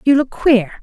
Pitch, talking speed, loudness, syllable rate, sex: 250 Hz, 220 wpm, -15 LUFS, 4.1 syllables/s, female